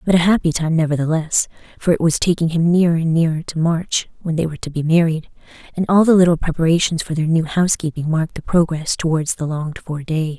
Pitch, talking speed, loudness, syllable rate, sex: 165 Hz, 220 wpm, -18 LUFS, 6.2 syllables/s, female